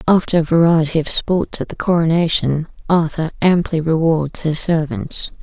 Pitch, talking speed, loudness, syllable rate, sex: 165 Hz, 145 wpm, -17 LUFS, 4.7 syllables/s, female